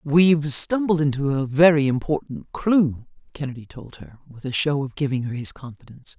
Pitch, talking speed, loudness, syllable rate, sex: 140 Hz, 175 wpm, -21 LUFS, 5.2 syllables/s, female